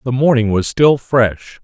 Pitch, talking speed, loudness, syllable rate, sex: 120 Hz, 185 wpm, -14 LUFS, 4.0 syllables/s, male